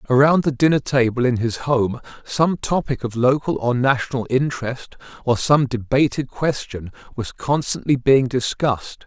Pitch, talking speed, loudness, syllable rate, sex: 130 Hz, 145 wpm, -20 LUFS, 4.7 syllables/s, male